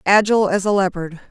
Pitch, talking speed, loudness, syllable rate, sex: 195 Hz, 185 wpm, -17 LUFS, 6.3 syllables/s, female